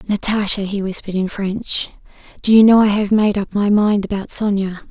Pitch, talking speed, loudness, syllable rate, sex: 205 Hz, 195 wpm, -16 LUFS, 5.3 syllables/s, female